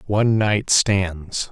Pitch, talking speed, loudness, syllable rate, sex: 100 Hz, 120 wpm, -19 LUFS, 3.0 syllables/s, male